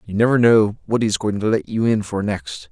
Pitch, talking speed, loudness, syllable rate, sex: 105 Hz, 265 wpm, -19 LUFS, 5.1 syllables/s, male